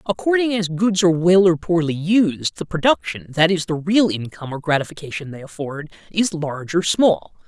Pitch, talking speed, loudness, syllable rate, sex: 170 Hz, 170 wpm, -19 LUFS, 5.3 syllables/s, male